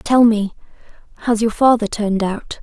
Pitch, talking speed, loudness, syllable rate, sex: 220 Hz, 160 wpm, -17 LUFS, 4.9 syllables/s, female